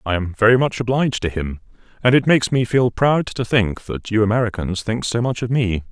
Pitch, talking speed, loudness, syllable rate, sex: 115 Hz, 235 wpm, -19 LUFS, 5.7 syllables/s, male